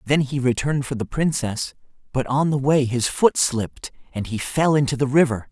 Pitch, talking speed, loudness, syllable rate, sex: 135 Hz, 205 wpm, -21 LUFS, 5.2 syllables/s, male